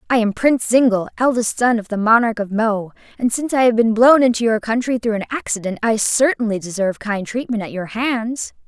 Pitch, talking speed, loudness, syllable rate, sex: 225 Hz, 215 wpm, -18 LUFS, 5.7 syllables/s, female